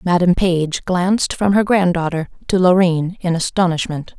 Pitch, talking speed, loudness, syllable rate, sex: 175 Hz, 145 wpm, -17 LUFS, 4.6 syllables/s, female